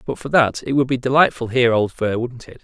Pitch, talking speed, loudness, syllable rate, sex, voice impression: 125 Hz, 275 wpm, -18 LUFS, 6.1 syllables/s, male, masculine, adult-like, slightly thick, slightly cool, slightly calm, slightly kind